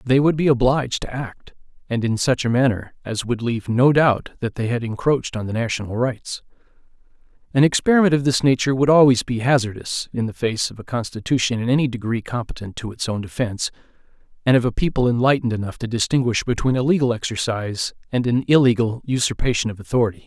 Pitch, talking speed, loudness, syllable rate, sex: 120 Hz, 190 wpm, -20 LUFS, 6.3 syllables/s, male